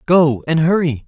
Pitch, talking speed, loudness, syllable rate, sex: 155 Hz, 165 wpm, -15 LUFS, 4.4 syllables/s, male